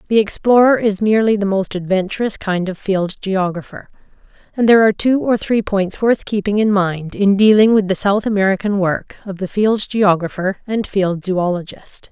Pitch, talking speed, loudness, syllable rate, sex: 200 Hz, 180 wpm, -16 LUFS, 5.1 syllables/s, female